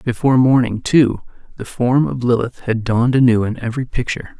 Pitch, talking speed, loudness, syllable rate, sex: 120 Hz, 180 wpm, -16 LUFS, 5.9 syllables/s, male